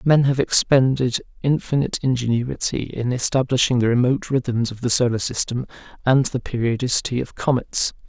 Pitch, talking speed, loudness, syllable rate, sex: 125 Hz, 140 wpm, -20 LUFS, 5.4 syllables/s, male